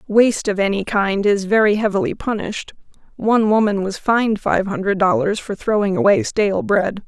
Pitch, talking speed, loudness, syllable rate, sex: 205 Hz, 160 wpm, -18 LUFS, 5.4 syllables/s, female